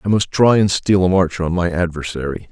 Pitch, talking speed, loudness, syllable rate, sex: 90 Hz, 240 wpm, -17 LUFS, 5.4 syllables/s, male